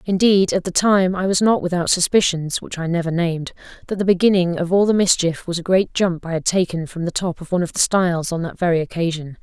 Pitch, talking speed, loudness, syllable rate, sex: 175 Hz, 250 wpm, -19 LUFS, 5.7 syllables/s, female